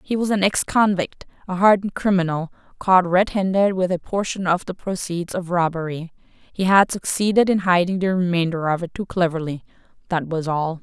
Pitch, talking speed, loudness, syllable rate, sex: 180 Hz, 175 wpm, -20 LUFS, 5.2 syllables/s, female